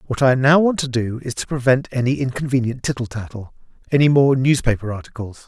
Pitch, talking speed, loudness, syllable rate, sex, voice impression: 130 Hz, 175 wpm, -19 LUFS, 6.0 syllables/s, male, very masculine, slightly old, very thick, tensed, powerful, bright, slightly soft, slightly muffled, fluent, raspy, cool, intellectual, slightly refreshing, sincere, calm, mature, friendly, reassuring, unique, elegant, wild, slightly sweet, lively, slightly strict, slightly intense, slightly modest